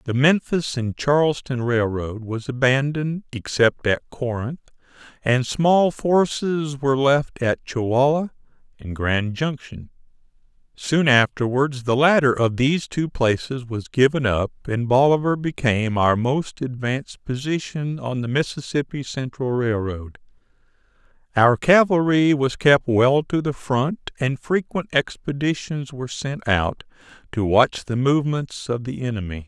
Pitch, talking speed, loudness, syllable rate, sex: 135 Hz, 130 wpm, -21 LUFS, 4.3 syllables/s, male